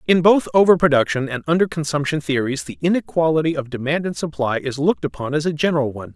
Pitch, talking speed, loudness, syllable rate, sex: 150 Hz, 205 wpm, -19 LUFS, 6.6 syllables/s, male